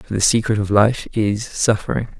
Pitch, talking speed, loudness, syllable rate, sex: 105 Hz, 190 wpm, -18 LUFS, 5.0 syllables/s, male